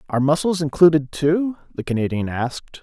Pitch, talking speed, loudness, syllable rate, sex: 150 Hz, 150 wpm, -20 LUFS, 5.7 syllables/s, male